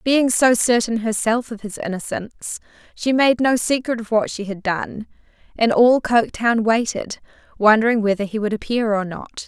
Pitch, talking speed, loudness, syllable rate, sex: 225 Hz, 170 wpm, -19 LUFS, 4.9 syllables/s, female